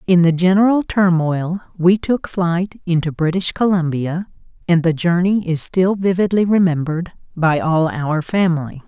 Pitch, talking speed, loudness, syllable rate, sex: 175 Hz, 140 wpm, -17 LUFS, 4.6 syllables/s, female